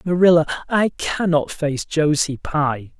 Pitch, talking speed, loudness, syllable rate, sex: 160 Hz, 120 wpm, -19 LUFS, 3.8 syllables/s, male